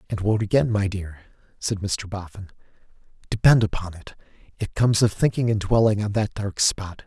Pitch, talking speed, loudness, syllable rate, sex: 100 Hz, 180 wpm, -22 LUFS, 5.3 syllables/s, male